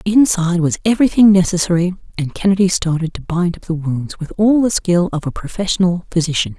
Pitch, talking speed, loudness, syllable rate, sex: 180 Hz, 180 wpm, -16 LUFS, 5.8 syllables/s, female